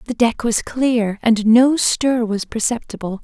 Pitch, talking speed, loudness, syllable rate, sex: 230 Hz, 165 wpm, -17 LUFS, 4.0 syllables/s, female